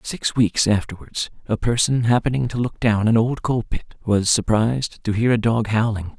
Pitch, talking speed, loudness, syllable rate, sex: 110 Hz, 195 wpm, -20 LUFS, 4.8 syllables/s, male